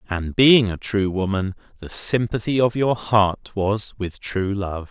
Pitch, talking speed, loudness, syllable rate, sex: 105 Hz, 170 wpm, -21 LUFS, 3.8 syllables/s, male